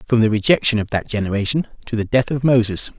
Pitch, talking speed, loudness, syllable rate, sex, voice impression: 115 Hz, 220 wpm, -18 LUFS, 6.5 syllables/s, male, very masculine, adult-like, slightly middle-aged, thick, slightly tensed, slightly weak, slightly dark, slightly soft, slightly muffled, slightly raspy, slightly cool, intellectual, slightly refreshing, slightly sincere, calm, mature, slightly friendly, slightly reassuring, unique, elegant, sweet, strict, slightly modest